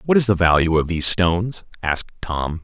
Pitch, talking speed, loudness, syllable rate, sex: 90 Hz, 205 wpm, -19 LUFS, 5.8 syllables/s, male